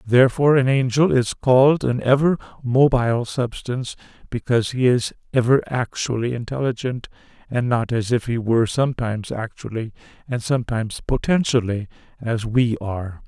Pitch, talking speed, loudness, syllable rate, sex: 120 Hz, 130 wpm, -20 LUFS, 5.3 syllables/s, male